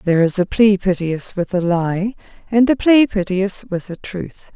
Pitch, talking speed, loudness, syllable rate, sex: 195 Hz, 195 wpm, -17 LUFS, 4.4 syllables/s, female